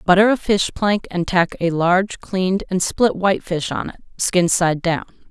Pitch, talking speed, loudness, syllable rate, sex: 185 Hz, 190 wpm, -19 LUFS, 4.7 syllables/s, female